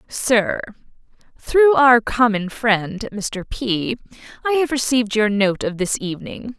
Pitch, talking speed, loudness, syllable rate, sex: 225 Hz, 130 wpm, -19 LUFS, 4.1 syllables/s, female